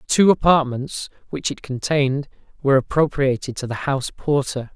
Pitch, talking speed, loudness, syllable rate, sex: 135 Hz, 140 wpm, -21 LUFS, 5.2 syllables/s, male